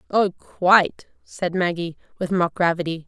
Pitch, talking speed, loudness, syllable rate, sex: 175 Hz, 135 wpm, -21 LUFS, 4.5 syllables/s, female